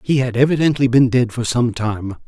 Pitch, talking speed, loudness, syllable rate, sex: 125 Hz, 210 wpm, -17 LUFS, 5.2 syllables/s, male